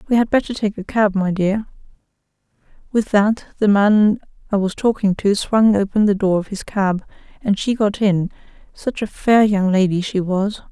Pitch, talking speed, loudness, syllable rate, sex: 205 Hz, 185 wpm, -18 LUFS, 4.8 syllables/s, female